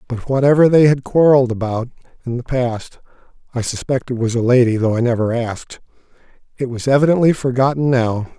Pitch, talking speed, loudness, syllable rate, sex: 125 Hz, 155 wpm, -16 LUFS, 5.9 syllables/s, male